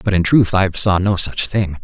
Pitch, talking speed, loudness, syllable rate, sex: 95 Hz, 260 wpm, -16 LUFS, 4.7 syllables/s, male